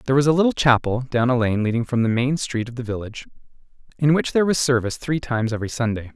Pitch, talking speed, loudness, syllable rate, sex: 125 Hz, 245 wpm, -21 LUFS, 7.2 syllables/s, male